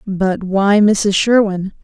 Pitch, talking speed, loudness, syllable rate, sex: 200 Hz, 130 wpm, -14 LUFS, 3.1 syllables/s, female